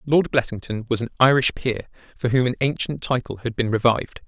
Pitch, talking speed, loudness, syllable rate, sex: 125 Hz, 195 wpm, -22 LUFS, 5.6 syllables/s, male